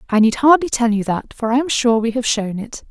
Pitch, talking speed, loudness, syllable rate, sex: 235 Hz, 290 wpm, -17 LUFS, 5.5 syllables/s, female